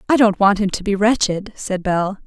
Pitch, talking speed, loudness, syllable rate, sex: 200 Hz, 240 wpm, -18 LUFS, 5.0 syllables/s, female